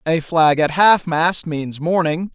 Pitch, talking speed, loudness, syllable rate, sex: 165 Hz, 180 wpm, -17 LUFS, 3.6 syllables/s, male